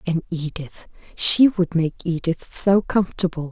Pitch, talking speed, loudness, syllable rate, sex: 175 Hz, 120 wpm, -19 LUFS, 4.4 syllables/s, female